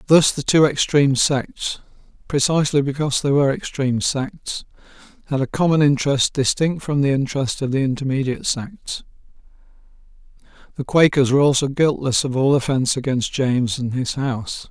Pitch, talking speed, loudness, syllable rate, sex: 140 Hz, 145 wpm, -19 LUFS, 5.6 syllables/s, male